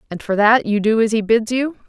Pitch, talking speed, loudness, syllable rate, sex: 225 Hz, 285 wpm, -17 LUFS, 5.7 syllables/s, female